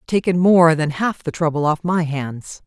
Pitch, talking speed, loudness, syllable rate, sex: 165 Hz, 200 wpm, -18 LUFS, 4.4 syllables/s, female